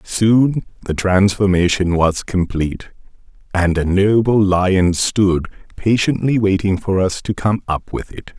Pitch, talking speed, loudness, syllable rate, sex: 95 Hz, 135 wpm, -16 LUFS, 4.0 syllables/s, male